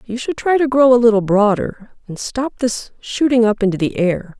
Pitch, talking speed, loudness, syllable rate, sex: 230 Hz, 220 wpm, -16 LUFS, 4.9 syllables/s, female